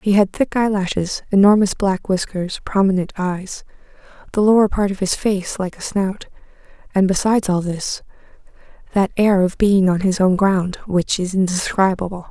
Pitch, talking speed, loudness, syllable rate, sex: 195 Hz, 160 wpm, -18 LUFS, 4.9 syllables/s, female